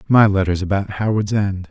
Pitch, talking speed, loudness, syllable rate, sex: 100 Hz, 175 wpm, -18 LUFS, 5.2 syllables/s, male